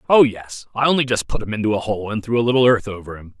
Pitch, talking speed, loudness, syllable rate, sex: 110 Hz, 300 wpm, -19 LUFS, 6.7 syllables/s, male